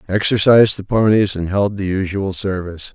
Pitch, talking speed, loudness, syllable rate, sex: 100 Hz, 165 wpm, -16 LUFS, 5.4 syllables/s, male